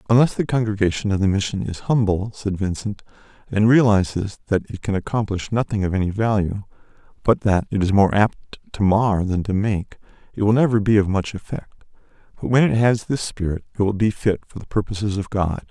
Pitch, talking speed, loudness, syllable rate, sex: 105 Hz, 200 wpm, -20 LUFS, 5.5 syllables/s, male